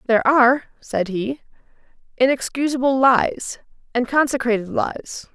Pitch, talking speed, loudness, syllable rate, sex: 250 Hz, 100 wpm, -19 LUFS, 5.0 syllables/s, female